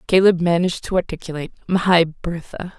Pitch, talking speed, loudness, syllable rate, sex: 175 Hz, 130 wpm, -19 LUFS, 6.1 syllables/s, female